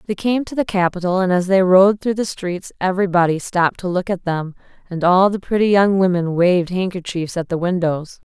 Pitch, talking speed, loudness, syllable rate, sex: 185 Hz, 210 wpm, -18 LUFS, 5.5 syllables/s, female